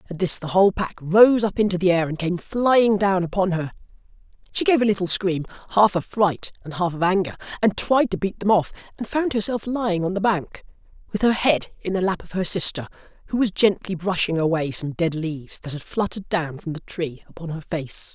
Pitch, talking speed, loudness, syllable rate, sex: 185 Hz, 225 wpm, -22 LUFS, 5.5 syllables/s, male